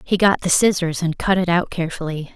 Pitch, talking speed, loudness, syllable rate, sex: 175 Hz, 230 wpm, -19 LUFS, 5.8 syllables/s, female